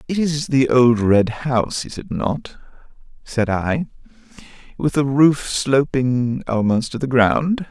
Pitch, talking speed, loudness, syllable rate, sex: 130 Hz, 150 wpm, -18 LUFS, 3.7 syllables/s, male